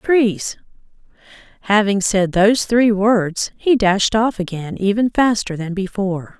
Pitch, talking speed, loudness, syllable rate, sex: 205 Hz, 130 wpm, -17 LUFS, 4.0 syllables/s, female